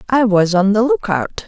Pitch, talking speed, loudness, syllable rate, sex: 225 Hz, 245 wpm, -15 LUFS, 4.7 syllables/s, female